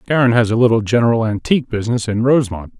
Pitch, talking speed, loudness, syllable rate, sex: 115 Hz, 195 wpm, -16 LUFS, 7.2 syllables/s, male